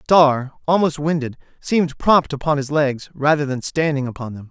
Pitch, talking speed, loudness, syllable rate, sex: 145 Hz, 175 wpm, -19 LUFS, 5.2 syllables/s, male